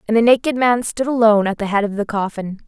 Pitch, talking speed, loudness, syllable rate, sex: 220 Hz, 270 wpm, -17 LUFS, 6.5 syllables/s, female